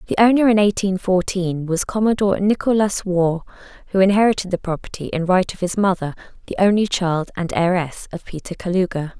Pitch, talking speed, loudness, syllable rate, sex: 190 Hz, 170 wpm, -19 LUFS, 5.7 syllables/s, female